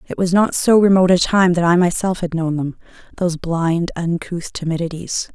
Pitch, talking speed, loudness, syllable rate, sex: 175 Hz, 190 wpm, -17 LUFS, 5.3 syllables/s, female